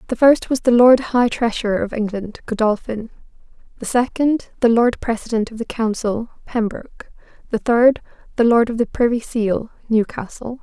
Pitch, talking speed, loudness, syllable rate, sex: 230 Hz, 160 wpm, -18 LUFS, 4.9 syllables/s, female